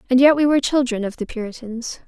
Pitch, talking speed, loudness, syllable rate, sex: 250 Hz, 230 wpm, -19 LUFS, 6.6 syllables/s, female